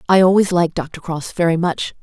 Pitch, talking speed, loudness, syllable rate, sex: 170 Hz, 210 wpm, -17 LUFS, 5.6 syllables/s, female